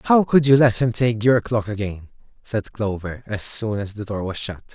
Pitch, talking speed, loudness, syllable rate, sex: 110 Hz, 230 wpm, -20 LUFS, 4.9 syllables/s, male